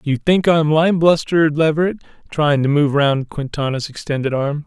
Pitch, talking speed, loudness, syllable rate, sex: 150 Hz, 165 wpm, -17 LUFS, 5.2 syllables/s, male